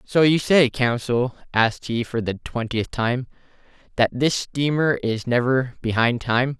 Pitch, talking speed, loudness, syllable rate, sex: 125 Hz, 155 wpm, -21 LUFS, 4.1 syllables/s, male